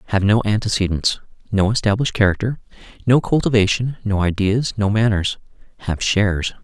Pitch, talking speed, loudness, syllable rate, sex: 105 Hz, 125 wpm, -19 LUFS, 5.6 syllables/s, male